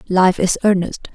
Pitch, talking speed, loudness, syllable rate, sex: 190 Hz, 155 wpm, -17 LUFS, 4.6 syllables/s, female